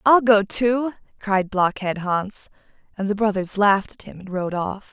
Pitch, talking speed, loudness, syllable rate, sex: 205 Hz, 185 wpm, -21 LUFS, 4.4 syllables/s, female